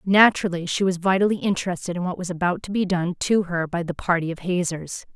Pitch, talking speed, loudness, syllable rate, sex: 180 Hz, 220 wpm, -23 LUFS, 6.1 syllables/s, female